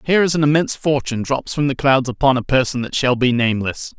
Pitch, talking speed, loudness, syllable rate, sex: 135 Hz, 240 wpm, -17 LUFS, 6.4 syllables/s, male